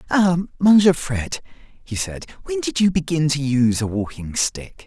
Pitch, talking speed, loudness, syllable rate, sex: 150 Hz, 160 wpm, -20 LUFS, 4.5 syllables/s, male